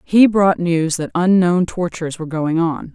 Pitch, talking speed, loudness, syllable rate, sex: 175 Hz, 185 wpm, -17 LUFS, 4.6 syllables/s, female